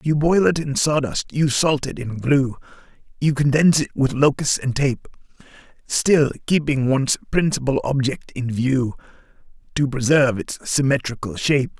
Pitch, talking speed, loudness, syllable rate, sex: 135 Hz, 150 wpm, -20 LUFS, 4.8 syllables/s, male